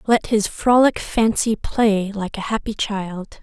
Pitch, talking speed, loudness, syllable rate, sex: 210 Hz, 160 wpm, -19 LUFS, 3.8 syllables/s, female